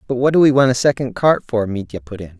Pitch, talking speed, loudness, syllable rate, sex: 120 Hz, 300 wpm, -16 LUFS, 6.4 syllables/s, male